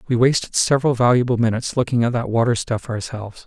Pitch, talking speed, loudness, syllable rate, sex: 120 Hz, 190 wpm, -19 LUFS, 6.7 syllables/s, male